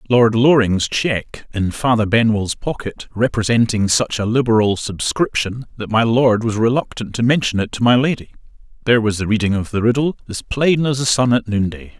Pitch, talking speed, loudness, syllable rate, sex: 115 Hz, 180 wpm, -17 LUFS, 5.2 syllables/s, male